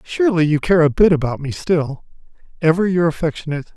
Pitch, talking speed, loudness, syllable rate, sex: 165 Hz, 160 wpm, -17 LUFS, 6.2 syllables/s, male